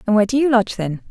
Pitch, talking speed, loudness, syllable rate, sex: 220 Hz, 325 wpm, -17 LUFS, 8.8 syllables/s, female